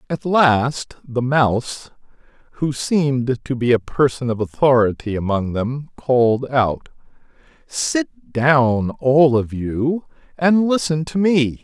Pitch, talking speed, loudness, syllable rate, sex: 135 Hz, 130 wpm, -18 LUFS, 3.6 syllables/s, male